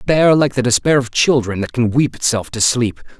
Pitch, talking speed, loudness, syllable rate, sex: 125 Hz, 225 wpm, -15 LUFS, 5.5 syllables/s, male